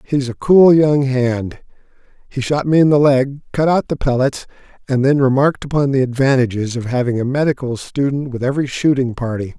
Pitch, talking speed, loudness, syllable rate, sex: 135 Hz, 195 wpm, -16 LUFS, 5.5 syllables/s, male